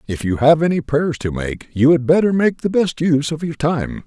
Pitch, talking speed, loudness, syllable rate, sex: 150 Hz, 250 wpm, -17 LUFS, 5.2 syllables/s, male